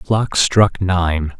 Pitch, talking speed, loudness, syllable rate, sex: 95 Hz, 170 wpm, -16 LUFS, 3.1 syllables/s, male